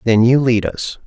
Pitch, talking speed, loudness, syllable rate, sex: 115 Hz, 225 wpm, -15 LUFS, 4.4 syllables/s, male